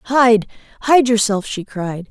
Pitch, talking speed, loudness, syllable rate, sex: 225 Hz, 145 wpm, -16 LUFS, 3.6 syllables/s, female